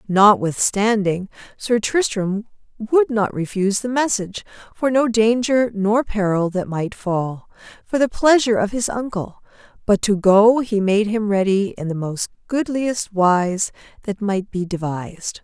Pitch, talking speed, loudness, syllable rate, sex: 210 Hz, 150 wpm, -19 LUFS, 4.2 syllables/s, female